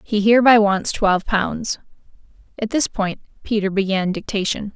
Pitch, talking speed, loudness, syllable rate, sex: 205 Hz, 140 wpm, -19 LUFS, 2.9 syllables/s, female